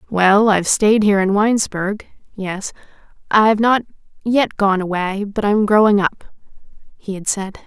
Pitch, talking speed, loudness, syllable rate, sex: 205 Hz, 135 wpm, -16 LUFS, 4.7 syllables/s, female